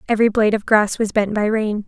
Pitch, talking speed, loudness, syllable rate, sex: 215 Hz, 255 wpm, -18 LUFS, 6.4 syllables/s, female